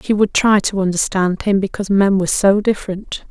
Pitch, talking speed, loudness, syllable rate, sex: 195 Hz, 200 wpm, -16 LUFS, 5.5 syllables/s, female